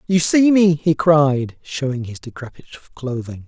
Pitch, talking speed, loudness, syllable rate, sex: 145 Hz, 155 wpm, -17 LUFS, 4.3 syllables/s, male